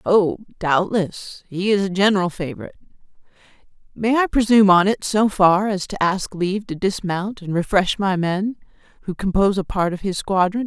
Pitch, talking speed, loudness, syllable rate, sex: 195 Hz, 175 wpm, -19 LUFS, 5.2 syllables/s, female